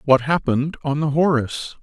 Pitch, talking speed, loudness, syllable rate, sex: 145 Hz, 165 wpm, -20 LUFS, 5.7 syllables/s, male